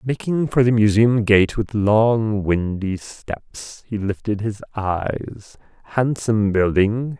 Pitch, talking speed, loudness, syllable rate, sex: 110 Hz, 125 wpm, -20 LUFS, 3.4 syllables/s, male